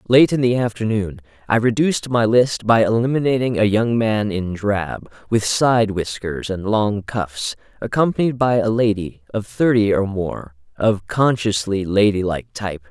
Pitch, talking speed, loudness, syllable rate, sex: 110 Hz, 155 wpm, -19 LUFS, 4.6 syllables/s, male